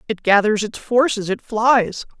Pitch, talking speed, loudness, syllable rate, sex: 220 Hz, 165 wpm, -18 LUFS, 4.2 syllables/s, female